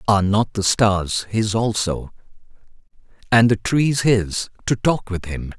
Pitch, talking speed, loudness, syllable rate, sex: 105 Hz, 150 wpm, -19 LUFS, 4.0 syllables/s, male